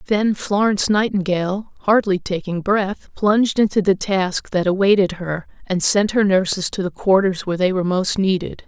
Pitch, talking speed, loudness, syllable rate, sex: 195 Hz, 175 wpm, -19 LUFS, 5.0 syllables/s, female